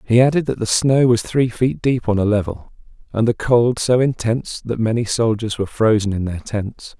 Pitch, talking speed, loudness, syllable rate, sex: 115 Hz, 215 wpm, -18 LUFS, 5.1 syllables/s, male